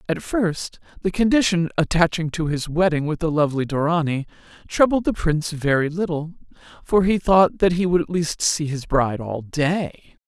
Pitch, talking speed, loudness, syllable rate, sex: 165 Hz, 175 wpm, -21 LUFS, 5.0 syllables/s, female